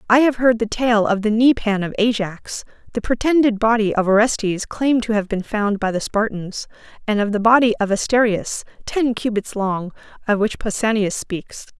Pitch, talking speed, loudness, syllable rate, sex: 215 Hz, 185 wpm, -19 LUFS, 5.0 syllables/s, female